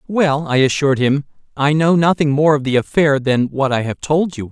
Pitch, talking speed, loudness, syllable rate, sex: 145 Hz, 225 wpm, -16 LUFS, 5.2 syllables/s, male